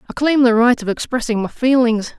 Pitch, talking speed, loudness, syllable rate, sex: 240 Hz, 220 wpm, -16 LUFS, 5.6 syllables/s, female